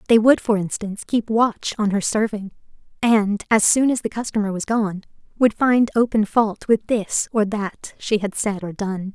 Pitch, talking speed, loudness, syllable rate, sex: 215 Hz, 195 wpm, -20 LUFS, 4.5 syllables/s, female